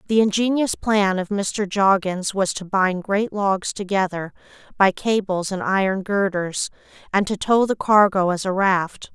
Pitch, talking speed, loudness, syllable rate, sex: 195 Hz, 165 wpm, -20 LUFS, 4.2 syllables/s, female